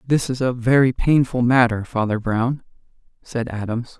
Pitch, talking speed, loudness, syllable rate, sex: 120 Hz, 150 wpm, -20 LUFS, 4.5 syllables/s, male